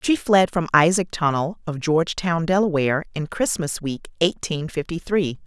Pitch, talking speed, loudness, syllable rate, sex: 165 Hz, 155 wpm, -21 LUFS, 4.9 syllables/s, female